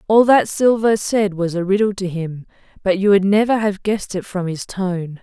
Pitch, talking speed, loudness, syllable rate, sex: 195 Hz, 220 wpm, -18 LUFS, 4.9 syllables/s, female